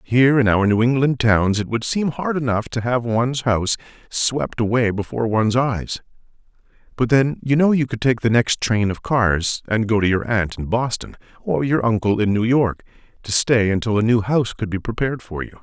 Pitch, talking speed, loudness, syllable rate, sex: 115 Hz, 215 wpm, -19 LUFS, 5.2 syllables/s, male